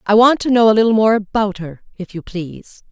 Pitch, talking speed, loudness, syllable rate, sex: 210 Hz, 245 wpm, -15 LUFS, 5.7 syllables/s, female